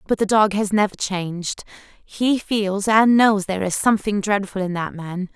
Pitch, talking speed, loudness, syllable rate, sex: 200 Hz, 190 wpm, -20 LUFS, 4.8 syllables/s, female